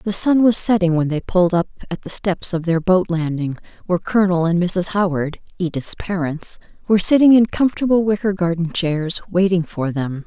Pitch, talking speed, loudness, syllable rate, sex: 180 Hz, 185 wpm, -18 LUFS, 5.4 syllables/s, female